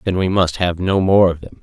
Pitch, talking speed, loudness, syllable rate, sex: 90 Hz, 295 wpm, -16 LUFS, 5.3 syllables/s, male